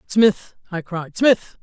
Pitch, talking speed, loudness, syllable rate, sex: 195 Hz, 150 wpm, -19 LUFS, 3.0 syllables/s, female